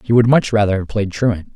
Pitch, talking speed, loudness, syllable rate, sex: 105 Hz, 270 wpm, -16 LUFS, 5.5 syllables/s, male